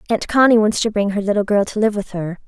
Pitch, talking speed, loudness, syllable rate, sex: 210 Hz, 290 wpm, -17 LUFS, 6.3 syllables/s, female